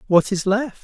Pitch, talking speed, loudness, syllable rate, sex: 205 Hz, 215 wpm, -19 LUFS, 4.6 syllables/s, male